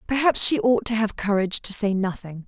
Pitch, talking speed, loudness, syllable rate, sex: 220 Hz, 220 wpm, -21 LUFS, 5.6 syllables/s, female